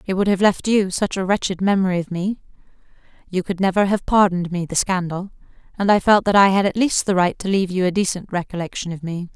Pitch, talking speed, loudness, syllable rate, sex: 190 Hz, 230 wpm, -19 LUFS, 6.2 syllables/s, female